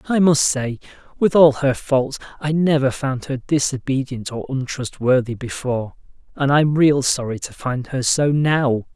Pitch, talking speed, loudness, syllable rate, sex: 135 Hz, 160 wpm, -19 LUFS, 4.4 syllables/s, male